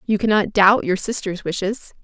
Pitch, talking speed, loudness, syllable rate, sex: 205 Hz, 175 wpm, -19 LUFS, 4.9 syllables/s, female